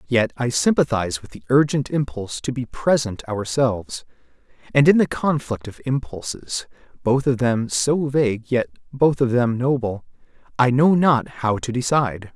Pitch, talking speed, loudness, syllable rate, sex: 125 Hz, 160 wpm, -21 LUFS, 4.8 syllables/s, male